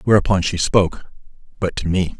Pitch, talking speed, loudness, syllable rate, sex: 90 Hz, 165 wpm, -19 LUFS, 5.8 syllables/s, male